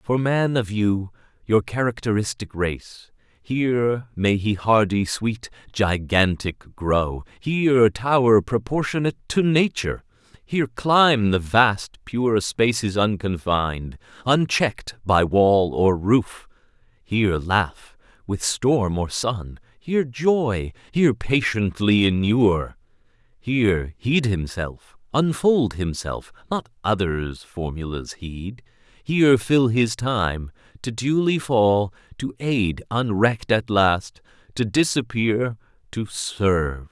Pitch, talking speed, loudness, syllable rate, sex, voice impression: 110 Hz, 110 wpm, -21 LUFS, 3.7 syllables/s, male, very masculine, very adult-like, middle-aged, very thick, tensed, powerful, bright, soft, clear, fluent, slightly raspy, very cool, intellectual, refreshing, sincere, very calm, mature, friendly, very reassuring, slightly unique, very wild, sweet, very lively, kind, slightly intense